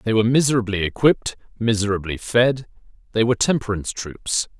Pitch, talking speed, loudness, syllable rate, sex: 110 Hz, 130 wpm, -20 LUFS, 6.2 syllables/s, male